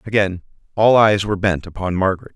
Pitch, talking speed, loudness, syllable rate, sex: 100 Hz, 180 wpm, -17 LUFS, 6.3 syllables/s, male